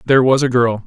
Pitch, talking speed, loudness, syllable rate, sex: 125 Hz, 280 wpm, -14 LUFS, 6.5 syllables/s, male